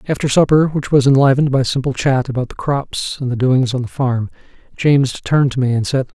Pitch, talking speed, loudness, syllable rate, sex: 130 Hz, 225 wpm, -16 LUFS, 5.9 syllables/s, male